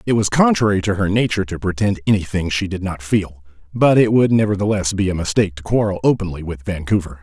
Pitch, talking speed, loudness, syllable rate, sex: 95 Hz, 210 wpm, -18 LUFS, 6.3 syllables/s, male